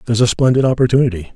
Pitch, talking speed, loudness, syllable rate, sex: 120 Hz, 175 wpm, -14 LUFS, 8.4 syllables/s, male